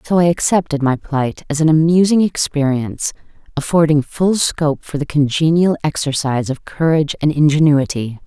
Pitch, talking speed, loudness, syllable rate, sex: 150 Hz, 145 wpm, -16 LUFS, 5.3 syllables/s, female